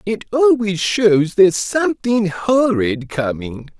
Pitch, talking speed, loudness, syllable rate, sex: 195 Hz, 110 wpm, -16 LUFS, 3.7 syllables/s, male